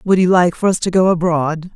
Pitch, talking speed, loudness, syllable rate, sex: 175 Hz, 275 wpm, -15 LUFS, 5.5 syllables/s, female